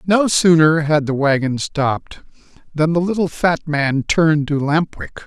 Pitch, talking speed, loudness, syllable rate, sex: 155 Hz, 170 wpm, -17 LUFS, 4.3 syllables/s, male